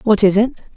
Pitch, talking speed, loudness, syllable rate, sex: 215 Hz, 235 wpm, -15 LUFS, 6.8 syllables/s, female